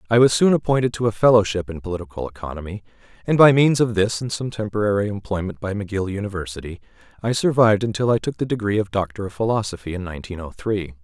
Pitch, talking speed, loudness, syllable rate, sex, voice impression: 105 Hz, 200 wpm, -21 LUFS, 6.8 syllables/s, male, masculine, adult-like, slightly middle-aged, tensed, slightly weak, bright, soft, slightly muffled, fluent, slightly raspy, cool, intellectual, slightly refreshing, slightly sincere, slightly calm, mature, friendly, reassuring, elegant, sweet, slightly lively, kind